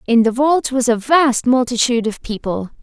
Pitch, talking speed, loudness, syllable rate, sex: 245 Hz, 190 wpm, -16 LUFS, 5.0 syllables/s, female